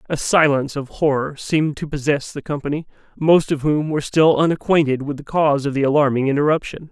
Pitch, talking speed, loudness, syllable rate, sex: 145 Hz, 190 wpm, -19 LUFS, 6.1 syllables/s, male